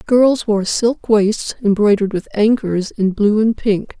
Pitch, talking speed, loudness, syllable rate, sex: 215 Hz, 165 wpm, -16 LUFS, 4.0 syllables/s, female